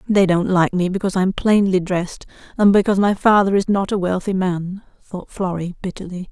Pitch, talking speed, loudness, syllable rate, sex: 190 Hz, 200 wpm, -18 LUFS, 5.7 syllables/s, female